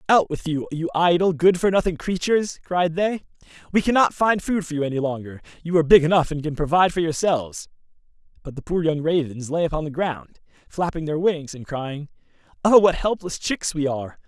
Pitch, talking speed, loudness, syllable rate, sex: 165 Hz, 200 wpm, -21 LUFS, 5.7 syllables/s, male